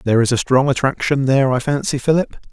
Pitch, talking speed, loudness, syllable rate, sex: 135 Hz, 215 wpm, -17 LUFS, 6.3 syllables/s, male